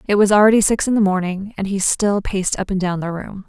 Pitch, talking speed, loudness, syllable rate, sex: 195 Hz, 275 wpm, -17 LUFS, 6.1 syllables/s, female